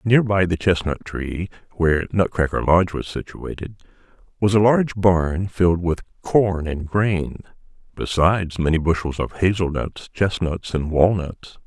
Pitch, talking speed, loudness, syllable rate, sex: 90 Hz, 145 wpm, -21 LUFS, 4.5 syllables/s, male